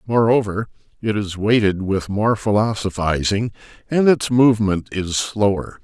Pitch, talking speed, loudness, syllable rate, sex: 105 Hz, 125 wpm, -19 LUFS, 4.4 syllables/s, male